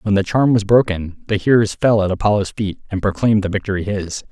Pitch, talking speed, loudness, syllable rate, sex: 100 Hz, 225 wpm, -17 LUFS, 6.0 syllables/s, male